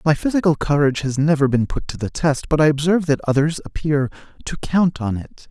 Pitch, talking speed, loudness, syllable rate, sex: 150 Hz, 220 wpm, -19 LUFS, 5.8 syllables/s, male